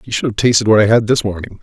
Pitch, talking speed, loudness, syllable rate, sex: 110 Hz, 335 wpm, -14 LUFS, 7.2 syllables/s, male